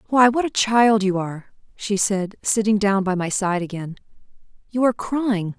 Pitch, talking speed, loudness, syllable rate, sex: 205 Hz, 185 wpm, -20 LUFS, 4.8 syllables/s, female